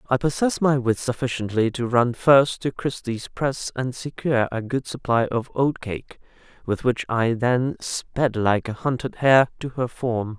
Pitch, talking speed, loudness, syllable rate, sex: 125 Hz, 175 wpm, -22 LUFS, 4.4 syllables/s, male